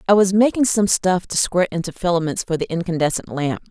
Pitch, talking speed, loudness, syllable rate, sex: 180 Hz, 210 wpm, -19 LUFS, 5.8 syllables/s, female